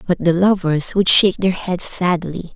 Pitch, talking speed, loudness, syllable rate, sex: 180 Hz, 190 wpm, -16 LUFS, 4.6 syllables/s, female